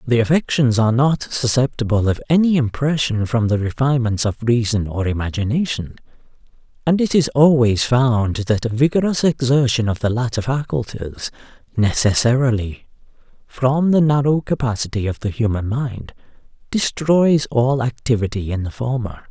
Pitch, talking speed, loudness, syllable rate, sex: 120 Hz, 135 wpm, -18 LUFS, 5.0 syllables/s, male